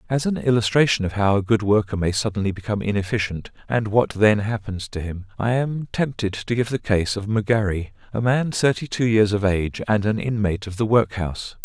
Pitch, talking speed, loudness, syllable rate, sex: 105 Hz, 205 wpm, -22 LUFS, 5.5 syllables/s, male